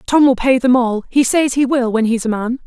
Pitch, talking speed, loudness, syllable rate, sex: 250 Hz, 295 wpm, -15 LUFS, 5.4 syllables/s, female